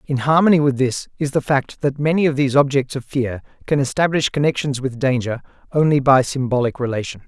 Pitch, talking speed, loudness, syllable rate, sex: 135 Hz, 190 wpm, -18 LUFS, 5.9 syllables/s, male